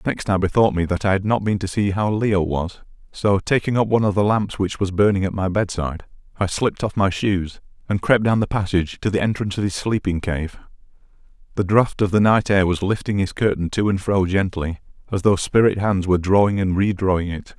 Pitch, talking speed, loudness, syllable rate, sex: 100 Hz, 230 wpm, -20 LUFS, 5.7 syllables/s, male